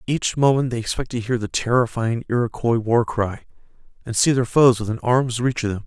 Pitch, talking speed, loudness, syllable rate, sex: 120 Hz, 205 wpm, -20 LUFS, 5.5 syllables/s, male